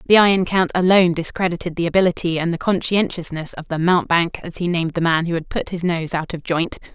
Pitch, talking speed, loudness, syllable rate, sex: 170 Hz, 225 wpm, -19 LUFS, 6.2 syllables/s, female